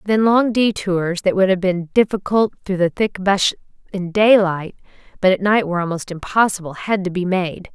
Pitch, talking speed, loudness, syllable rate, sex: 190 Hz, 185 wpm, -18 LUFS, 5.0 syllables/s, female